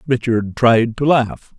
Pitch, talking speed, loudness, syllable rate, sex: 120 Hz, 150 wpm, -16 LUFS, 3.6 syllables/s, male